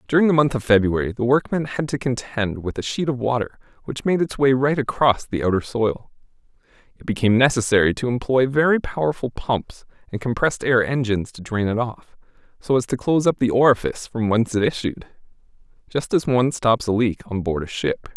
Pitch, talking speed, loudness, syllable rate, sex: 125 Hz, 200 wpm, -21 LUFS, 5.7 syllables/s, male